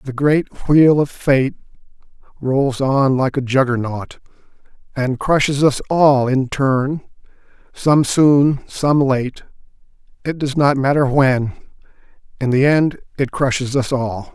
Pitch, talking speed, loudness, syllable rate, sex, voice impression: 135 Hz, 130 wpm, -17 LUFS, 3.8 syllables/s, male, masculine, adult-like, middle-aged, thick, slightly tensed, slightly weak, slightly bright, slightly soft, slightly muffled, slightly halting, slightly cool, intellectual, slightly sincere, calm, mature, slightly friendly, reassuring, unique, wild, slightly lively, kind, modest